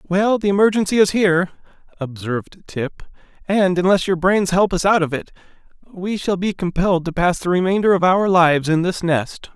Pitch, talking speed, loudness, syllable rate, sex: 180 Hz, 190 wpm, -18 LUFS, 5.2 syllables/s, male